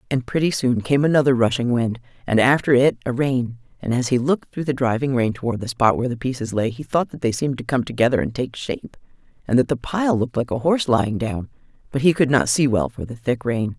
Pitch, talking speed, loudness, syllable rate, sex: 125 Hz, 250 wpm, -21 LUFS, 6.2 syllables/s, female